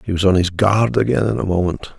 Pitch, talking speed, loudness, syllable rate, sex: 100 Hz, 270 wpm, -17 LUFS, 5.9 syllables/s, male